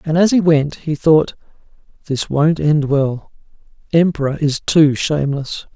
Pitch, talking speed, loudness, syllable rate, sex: 150 Hz, 145 wpm, -16 LUFS, 4.2 syllables/s, male